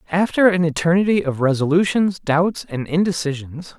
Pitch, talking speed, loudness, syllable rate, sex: 165 Hz, 125 wpm, -18 LUFS, 5.1 syllables/s, male